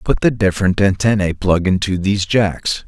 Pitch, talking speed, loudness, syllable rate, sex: 95 Hz, 165 wpm, -16 LUFS, 5.1 syllables/s, male